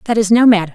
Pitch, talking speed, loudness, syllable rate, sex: 210 Hz, 325 wpm, -12 LUFS, 8.5 syllables/s, female